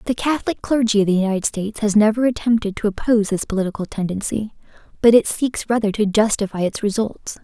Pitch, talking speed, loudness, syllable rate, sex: 215 Hz, 185 wpm, -19 LUFS, 6.3 syllables/s, female